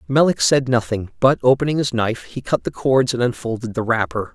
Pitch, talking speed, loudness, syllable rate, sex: 125 Hz, 205 wpm, -19 LUFS, 5.7 syllables/s, male